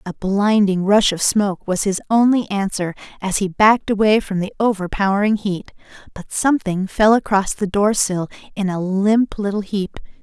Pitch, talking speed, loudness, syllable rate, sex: 200 Hz, 170 wpm, -18 LUFS, 4.9 syllables/s, female